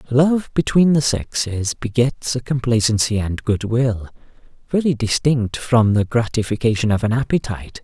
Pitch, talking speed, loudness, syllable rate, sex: 120 Hz, 140 wpm, -19 LUFS, 4.7 syllables/s, male